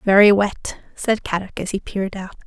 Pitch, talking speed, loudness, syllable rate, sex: 200 Hz, 195 wpm, -19 LUFS, 5.2 syllables/s, female